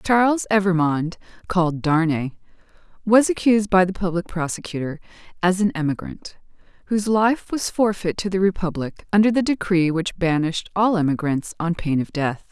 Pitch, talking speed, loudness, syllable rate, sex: 185 Hz, 150 wpm, -21 LUFS, 5.3 syllables/s, female